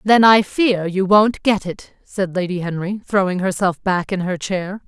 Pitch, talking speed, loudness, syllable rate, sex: 190 Hz, 195 wpm, -18 LUFS, 4.3 syllables/s, female